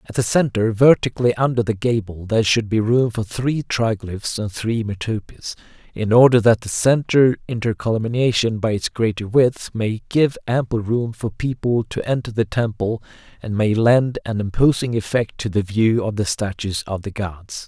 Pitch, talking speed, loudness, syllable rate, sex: 110 Hz, 175 wpm, -19 LUFS, 4.8 syllables/s, male